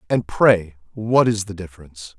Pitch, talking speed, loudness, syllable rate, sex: 100 Hz, 165 wpm, -18 LUFS, 5.0 syllables/s, male